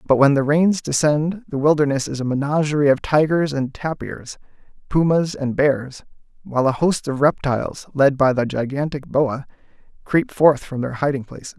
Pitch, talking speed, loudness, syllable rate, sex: 145 Hz, 170 wpm, -19 LUFS, 4.9 syllables/s, male